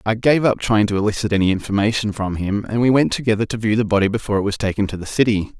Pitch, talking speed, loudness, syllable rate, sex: 105 Hz, 270 wpm, -19 LUFS, 7.0 syllables/s, male